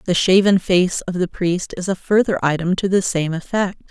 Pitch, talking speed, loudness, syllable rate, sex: 185 Hz, 215 wpm, -18 LUFS, 5.0 syllables/s, female